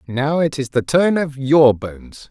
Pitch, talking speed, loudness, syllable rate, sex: 140 Hz, 210 wpm, -17 LUFS, 4.2 syllables/s, male